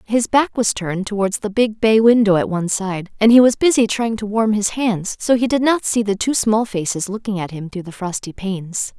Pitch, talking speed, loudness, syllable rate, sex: 210 Hz, 245 wpm, -17 LUFS, 5.3 syllables/s, female